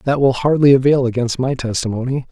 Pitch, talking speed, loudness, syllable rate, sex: 130 Hz, 180 wpm, -16 LUFS, 5.8 syllables/s, male